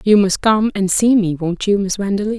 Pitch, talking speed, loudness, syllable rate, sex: 200 Hz, 250 wpm, -16 LUFS, 5.2 syllables/s, female